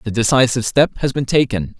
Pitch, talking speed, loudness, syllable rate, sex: 120 Hz, 200 wpm, -16 LUFS, 6.3 syllables/s, male